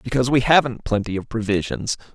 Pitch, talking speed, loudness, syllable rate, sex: 115 Hz, 170 wpm, -20 LUFS, 6.3 syllables/s, male